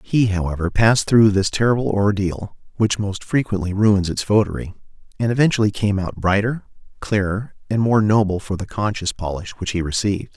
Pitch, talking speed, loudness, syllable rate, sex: 100 Hz, 170 wpm, -19 LUFS, 5.5 syllables/s, male